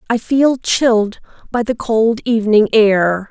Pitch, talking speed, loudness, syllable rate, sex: 225 Hz, 145 wpm, -14 LUFS, 4.0 syllables/s, female